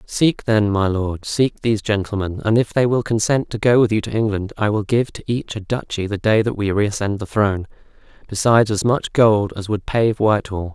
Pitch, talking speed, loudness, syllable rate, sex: 105 Hz, 225 wpm, -19 LUFS, 5.2 syllables/s, male